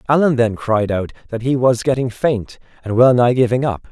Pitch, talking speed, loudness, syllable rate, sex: 120 Hz, 215 wpm, -17 LUFS, 5.1 syllables/s, male